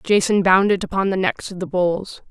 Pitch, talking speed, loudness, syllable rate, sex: 190 Hz, 235 wpm, -19 LUFS, 5.1 syllables/s, female